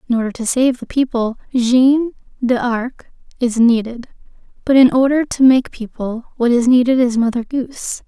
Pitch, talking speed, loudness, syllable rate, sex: 245 Hz, 165 wpm, -16 LUFS, 4.8 syllables/s, female